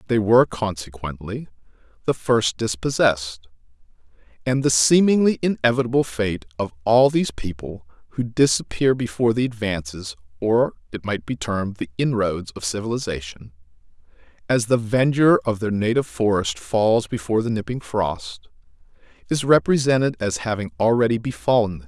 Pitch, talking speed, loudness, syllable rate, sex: 110 Hz, 130 wpm, -21 LUFS, 5.4 syllables/s, male